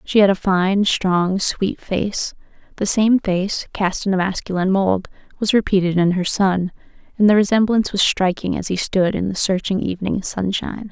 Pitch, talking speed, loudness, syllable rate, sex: 195 Hz, 180 wpm, -19 LUFS, 4.9 syllables/s, female